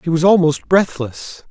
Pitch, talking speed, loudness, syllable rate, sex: 165 Hz, 160 wpm, -16 LUFS, 4.2 syllables/s, male